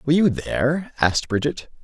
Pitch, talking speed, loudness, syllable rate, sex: 145 Hz, 165 wpm, -21 LUFS, 6.4 syllables/s, male